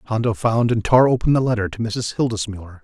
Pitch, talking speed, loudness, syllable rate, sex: 110 Hz, 210 wpm, -19 LUFS, 5.7 syllables/s, male